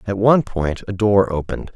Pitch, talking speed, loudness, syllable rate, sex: 100 Hz, 205 wpm, -18 LUFS, 5.7 syllables/s, male